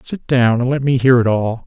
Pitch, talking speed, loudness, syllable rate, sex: 125 Hz, 290 wpm, -15 LUFS, 5.1 syllables/s, male